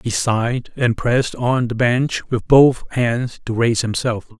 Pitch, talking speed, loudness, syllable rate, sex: 120 Hz, 180 wpm, -18 LUFS, 4.3 syllables/s, male